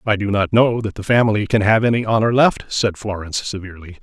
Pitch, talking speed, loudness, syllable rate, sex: 105 Hz, 225 wpm, -17 LUFS, 6.2 syllables/s, male